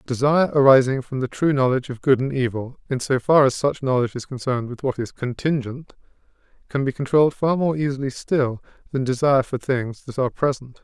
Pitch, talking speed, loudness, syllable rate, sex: 135 Hz, 200 wpm, -21 LUFS, 6.0 syllables/s, male